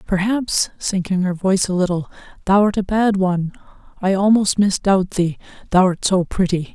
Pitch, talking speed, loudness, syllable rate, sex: 190 Hz, 150 wpm, -18 LUFS, 3.7 syllables/s, female